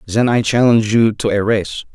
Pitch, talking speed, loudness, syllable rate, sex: 110 Hz, 215 wpm, -15 LUFS, 5.3 syllables/s, male